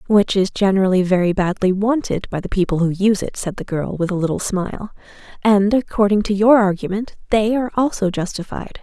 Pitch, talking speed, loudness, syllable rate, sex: 200 Hz, 190 wpm, -18 LUFS, 5.8 syllables/s, female